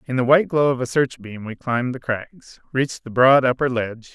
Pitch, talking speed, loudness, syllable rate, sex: 125 Hz, 230 wpm, -20 LUFS, 5.7 syllables/s, male